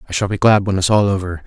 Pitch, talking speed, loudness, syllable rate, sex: 95 Hz, 330 wpm, -16 LUFS, 7.0 syllables/s, male